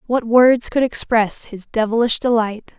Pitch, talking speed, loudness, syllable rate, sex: 230 Hz, 150 wpm, -17 LUFS, 4.3 syllables/s, female